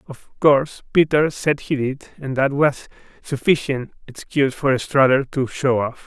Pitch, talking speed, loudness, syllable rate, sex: 135 Hz, 160 wpm, -19 LUFS, 4.4 syllables/s, male